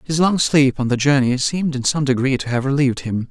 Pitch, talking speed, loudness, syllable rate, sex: 135 Hz, 255 wpm, -18 LUFS, 5.9 syllables/s, male